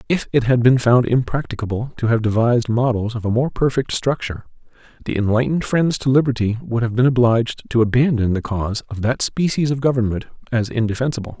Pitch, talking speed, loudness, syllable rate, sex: 120 Hz, 185 wpm, -19 LUFS, 6.1 syllables/s, male